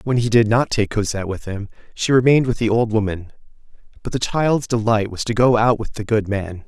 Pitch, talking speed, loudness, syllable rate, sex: 110 Hz, 235 wpm, -19 LUFS, 5.7 syllables/s, male